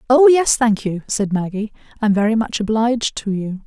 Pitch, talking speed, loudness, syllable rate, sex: 220 Hz, 195 wpm, -18 LUFS, 5.1 syllables/s, female